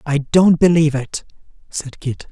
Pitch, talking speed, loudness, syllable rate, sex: 150 Hz, 155 wpm, -16 LUFS, 4.6 syllables/s, male